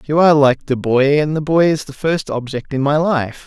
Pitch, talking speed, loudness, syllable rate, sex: 145 Hz, 260 wpm, -16 LUFS, 5.1 syllables/s, male